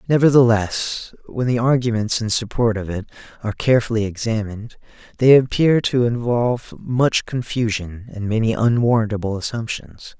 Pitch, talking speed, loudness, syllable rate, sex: 115 Hz, 125 wpm, -19 LUFS, 5.1 syllables/s, male